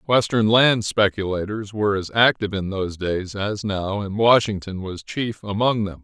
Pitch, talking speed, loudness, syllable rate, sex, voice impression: 105 Hz, 170 wpm, -21 LUFS, 4.7 syllables/s, male, very masculine, very adult-like, thick, slightly mature, wild